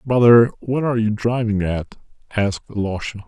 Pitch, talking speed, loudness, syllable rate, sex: 110 Hz, 145 wpm, -19 LUFS, 5.3 syllables/s, male